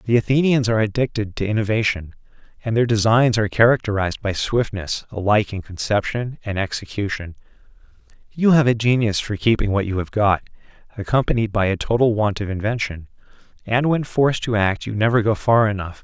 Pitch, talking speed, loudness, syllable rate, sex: 110 Hz, 170 wpm, -20 LUFS, 5.8 syllables/s, male